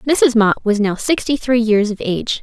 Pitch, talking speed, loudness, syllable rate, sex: 230 Hz, 225 wpm, -16 LUFS, 4.7 syllables/s, female